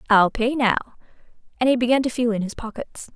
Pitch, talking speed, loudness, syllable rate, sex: 235 Hz, 210 wpm, -21 LUFS, 6.2 syllables/s, female